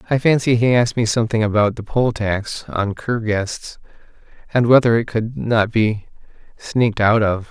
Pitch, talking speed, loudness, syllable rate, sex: 115 Hz, 175 wpm, -18 LUFS, 4.8 syllables/s, male